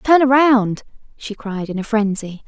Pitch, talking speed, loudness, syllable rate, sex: 225 Hz, 170 wpm, -17 LUFS, 4.4 syllables/s, female